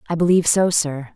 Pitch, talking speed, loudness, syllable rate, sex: 165 Hz, 210 wpm, -18 LUFS, 6.5 syllables/s, female